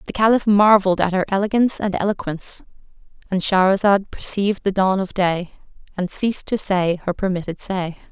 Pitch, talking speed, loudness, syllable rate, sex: 195 Hz, 155 wpm, -19 LUFS, 5.7 syllables/s, female